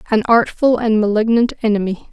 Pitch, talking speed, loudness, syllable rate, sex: 220 Hz, 140 wpm, -15 LUFS, 5.6 syllables/s, female